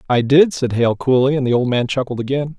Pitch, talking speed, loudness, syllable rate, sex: 130 Hz, 255 wpm, -16 LUFS, 5.8 syllables/s, male